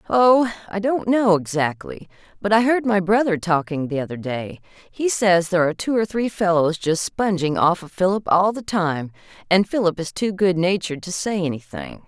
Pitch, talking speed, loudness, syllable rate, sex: 185 Hz, 190 wpm, -20 LUFS, 4.9 syllables/s, female